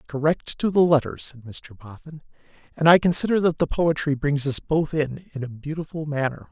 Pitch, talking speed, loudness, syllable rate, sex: 145 Hz, 195 wpm, -22 LUFS, 5.2 syllables/s, male